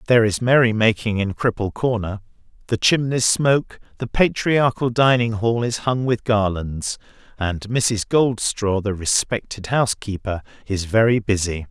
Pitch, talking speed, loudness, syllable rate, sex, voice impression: 110 Hz, 140 wpm, -20 LUFS, 4.5 syllables/s, male, masculine, adult-like, slightly thick, slightly refreshing, sincere